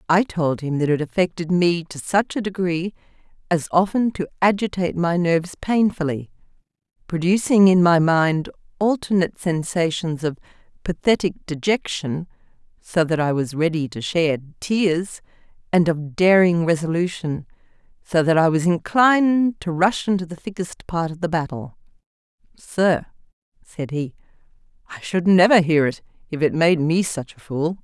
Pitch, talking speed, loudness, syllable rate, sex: 170 Hz, 145 wpm, -20 LUFS, 4.8 syllables/s, female